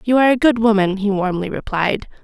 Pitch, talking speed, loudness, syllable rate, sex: 215 Hz, 215 wpm, -17 LUFS, 5.9 syllables/s, female